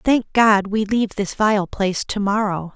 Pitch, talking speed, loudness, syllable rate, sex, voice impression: 205 Hz, 175 wpm, -19 LUFS, 4.5 syllables/s, female, feminine, adult-like, slightly bright, slightly soft, clear, slightly halting, friendly, slightly reassuring, slightly elegant, kind, slightly modest